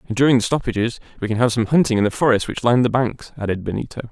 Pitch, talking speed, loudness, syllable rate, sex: 120 Hz, 260 wpm, -19 LUFS, 7.2 syllables/s, male